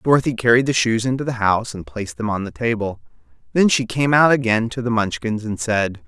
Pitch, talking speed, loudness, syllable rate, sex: 115 Hz, 225 wpm, -19 LUFS, 5.8 syllables/s, male